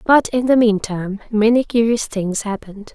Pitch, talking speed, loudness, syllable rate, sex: 220 Hz, 165 wpm, -17 LUFS, 5.1 syllables/s, female